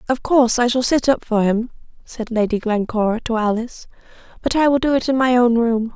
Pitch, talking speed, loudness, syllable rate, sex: 235 Hz, 220 wpm, -18 LUFS, 5.7 syllables/s, female